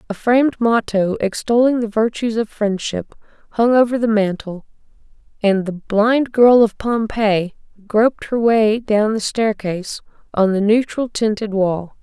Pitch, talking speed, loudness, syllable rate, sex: 215 Hz, 145 wpm, -17 LUFS, 4.3 syllables/s, female